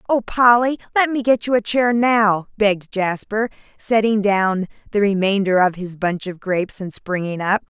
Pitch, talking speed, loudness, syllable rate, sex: 210 Hz, 175 wpm, -18 LUFS, 4.7 syllables/s, female